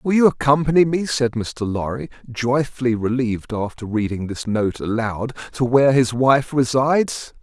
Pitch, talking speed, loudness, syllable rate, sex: 125 Hz, 155 wpm, -20 LUFS, 4.8 syllables/s, male